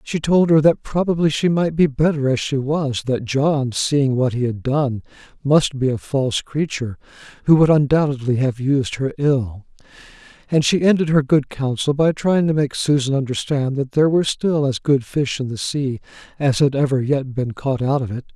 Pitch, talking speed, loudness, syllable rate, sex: 140 Hz, 205 wpm, -19 LUFS, 5.0 syllables/s, male